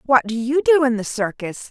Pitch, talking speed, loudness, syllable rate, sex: 250 Hz, 245 wpm, -19 LUFS, 5.3 syllables/s, female